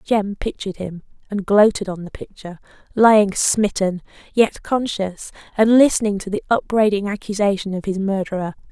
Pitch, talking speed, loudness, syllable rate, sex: 200 Hz, 145 wpm, -19 LUFS, 4.6 syllables/s, female